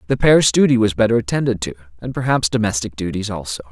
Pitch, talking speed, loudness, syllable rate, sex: 105 Hz, 195 wpm, -17 LUFS, 6.8 syllables/s, male